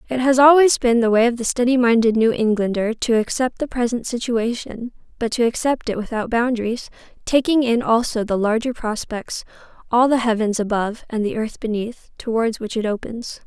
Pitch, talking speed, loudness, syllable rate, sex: 235 Hz, 170 wpm, -19 LUFS, 5.3 syllables/s, female